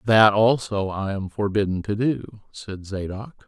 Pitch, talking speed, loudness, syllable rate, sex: 105 Hz, 155 wpm, -22 LUFS, 4.1 syllables/s, male